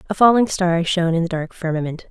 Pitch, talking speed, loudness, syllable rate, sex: 175 Hz, 230 wpm, -19 LUFS, 6.3 syllables/s, female